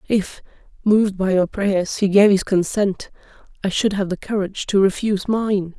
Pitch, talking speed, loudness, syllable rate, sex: 195 Hz, 175 wpm, -19 LUFS, 4.9 syllables/s, female